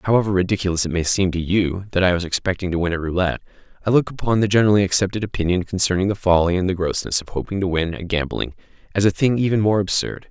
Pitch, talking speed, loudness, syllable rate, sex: 95 Hz, 235 wpm, -20 LUFS, 6.9 syllables/s, male